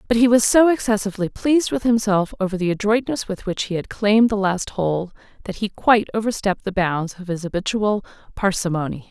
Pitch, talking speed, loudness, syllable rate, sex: 205 Hz, 190 wpm, -20 LUFS, 5.9 syllables/s, female